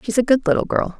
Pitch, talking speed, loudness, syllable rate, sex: 230 Hz, 300 wpm, -18 LUFS, 6.7 syllables/s, female